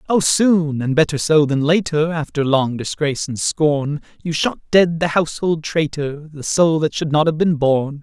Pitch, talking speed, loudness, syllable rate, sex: 155 Hz, 195 wpm, -18 LUFS, 4.5 syllables/s, male